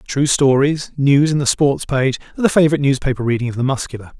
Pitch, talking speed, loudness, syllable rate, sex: 140 Hz, 215 wpm, -16 LUFS, 6.7 syllables/s, male